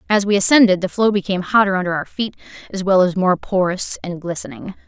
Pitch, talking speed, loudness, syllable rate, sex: 195 Hz, 210 wpm, -17 LUFS, 6.2 syllables/s, female